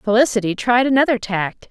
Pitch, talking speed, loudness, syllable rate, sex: 230 Hz, 140 wpm, -17 LUFS, 5.6 syllables/s, female